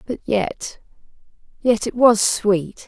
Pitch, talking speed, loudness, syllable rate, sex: 215 Hz, 105 wpm, -19 LUFS, 3.2 syllables/s, female